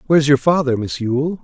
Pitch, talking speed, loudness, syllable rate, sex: 145 Hz, 210 wpm, -17 LUFS, 5.6 syllables/s, male